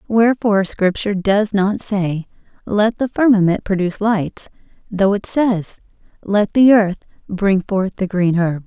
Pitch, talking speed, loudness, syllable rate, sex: 200 Hz, 145 wpm, -17 LUFS, 4.3 syllables/s, female